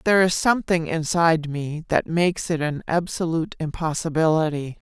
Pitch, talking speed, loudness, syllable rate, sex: 165 Hz, 135 wpm, -22 LUFS, 5.5 syllables/s, female